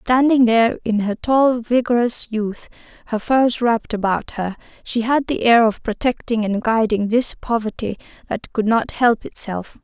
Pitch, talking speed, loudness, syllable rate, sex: 230 Hz, 165 wpm, -19 LUFS, 4.5 syllables/s, female